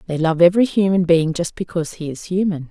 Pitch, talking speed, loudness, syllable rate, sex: 175 Hz, 220 wpm, -18 LUFS, 6.3 syllables/s, female